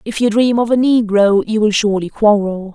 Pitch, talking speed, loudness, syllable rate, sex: 215 Hz, 220 wpm, -14 LUFS, 5.3 syllables/s, female